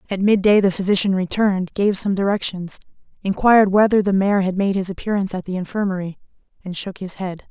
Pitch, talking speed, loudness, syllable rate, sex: 195 Hz, 190 wpm, -19 LUFS, 6.1 syllables/s, female